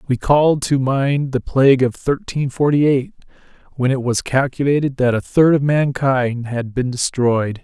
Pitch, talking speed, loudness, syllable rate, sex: 135 Hz, 175 wpm, -17 LUFS, 4.5 syllables/s, male